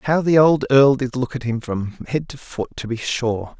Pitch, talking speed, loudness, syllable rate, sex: 130 Hz, 250 wpm, -19 LUFS, 4.7 syllables/s, male